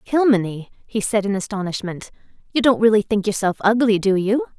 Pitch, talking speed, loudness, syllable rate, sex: 205 Hz, 170 wpm, -19 LUFS, 5.5 syllables/s, female